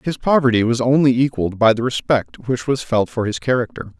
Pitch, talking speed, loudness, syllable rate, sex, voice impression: 125 Hz, 210 wpm, -18 LUFS, 5.7 syllables/s, male, very masculine, very middle-aged, thick, tensed, slightly powerful, slightly bright, soft, slightly muffled, slightly halting, slightly raspy, cool, intellectual, slightly refreshing, sincere, slightly calm, mature, friendly, reassuring, slightly unique, slightly elegant, wild, slightly sweet, lively, slightly strict, slightly intense